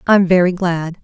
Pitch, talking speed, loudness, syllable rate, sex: 180 Hz, 175 wpm, -14 LUFS, 4.7 syllables/s, female